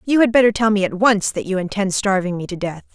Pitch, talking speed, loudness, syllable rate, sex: 205 Hz, 285 wpm, -18 LUFS, 6.2 syllables/s, female